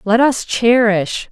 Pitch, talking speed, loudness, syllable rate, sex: 220 Hz, 135 wpm, -14 LUFS, 3.3 syllables/s, female